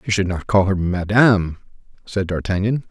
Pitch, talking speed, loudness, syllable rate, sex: 100 Hz, 165 wpm, -19 LUFS, 5.2 syllables/s, male